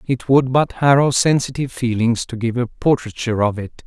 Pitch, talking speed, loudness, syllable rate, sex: 125 Hz, 185 wpm, -18 LUFS, 5.4 syllables/s, male